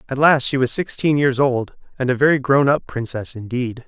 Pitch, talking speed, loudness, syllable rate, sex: 135 Hz, 215 wpm, -18 LUFS, 5.2 syllables/s, male